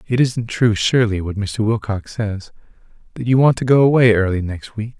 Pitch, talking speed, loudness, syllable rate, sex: 110 Hz, 205 wpm, -17 LUFS, 5.2 syllables/s, male